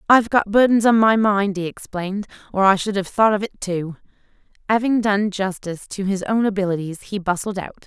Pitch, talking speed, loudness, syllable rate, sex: 200 Hz, 200 wpm, -20 LUFS, 5.8 syllables/s, female